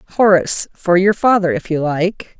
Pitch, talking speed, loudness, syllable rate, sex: 185 Hz, 175 wpm, -15 LUFS, 5.1 syllables/s, female